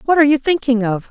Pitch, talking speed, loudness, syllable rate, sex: 265 Hz, 270 wpm, -15 LUFS, 7.2 syllables/s, female